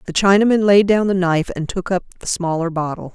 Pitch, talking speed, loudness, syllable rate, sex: 185 Hz, 230 wpm, -17 LUFS, 6.1 syllables/s, female